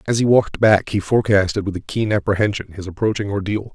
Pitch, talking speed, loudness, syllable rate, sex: 100 Hz, 210 wpm, -18 LUFS, 6.5 syllables/s, male